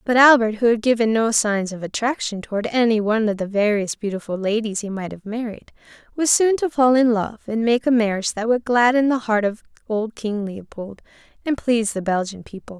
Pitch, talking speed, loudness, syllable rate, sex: 220 Hz, 210 wpm, -20 LUFS, 5.6 syllables/s, female